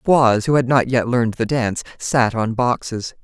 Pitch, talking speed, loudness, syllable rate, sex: 120 Hz, 205 wpm, -18 LUFS, 4.7 syllables/s, female